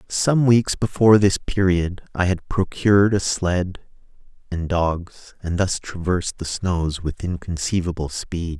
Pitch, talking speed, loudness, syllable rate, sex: 90 Hz, 140 wpm, -21 LUFS, 4.2 syllables/s, male